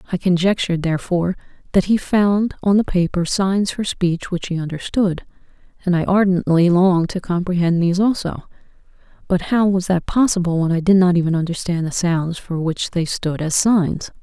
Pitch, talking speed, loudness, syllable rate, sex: 180 Hz, 175 wpm, -18 LUFS, 5.2 syllables/s, female